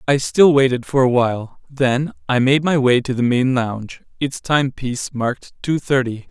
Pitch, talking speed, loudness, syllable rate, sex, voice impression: 130 Hz, 190 wpm, -18 LUFS, 5.0 syllables/s, male, masculine, adult-like, tensed, bright, slightly muffled, halting, calm, friendly, reassuring, slightly wild, kind